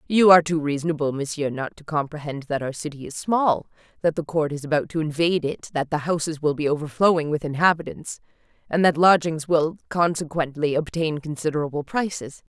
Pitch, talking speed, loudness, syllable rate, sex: 155 Hz, 175 wpm, -23 LUFS, 5.7 syllables/s, female